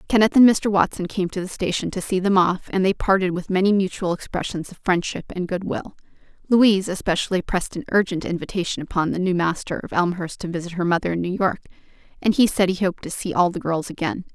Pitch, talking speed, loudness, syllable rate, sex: 185 Hz, 225 wpm, -21 LUFS, 6.2 syllables/s, female